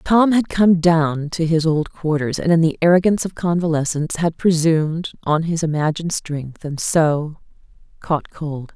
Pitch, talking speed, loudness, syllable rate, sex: 160 Hz, 165 wpm, -18 LUFS, 4.7 syllables/s, female